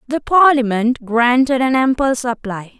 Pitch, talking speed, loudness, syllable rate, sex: 250 Hz, 130 wpm, -15 LUFS, 4.4 syllables/s, female